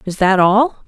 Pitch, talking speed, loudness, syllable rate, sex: 205 Hz, 205 wpm, -14 LUFS, 4.4 syllables/s, female